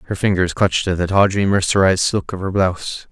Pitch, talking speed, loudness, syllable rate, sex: 95 Hz, 210 wpm, -17 LUFS, 6.2 syllables/s, male